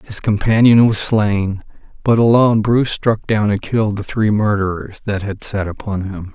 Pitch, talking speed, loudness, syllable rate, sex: 105 Hz, 180 wpm, -16 LUFS, 4.8 syllables/s, male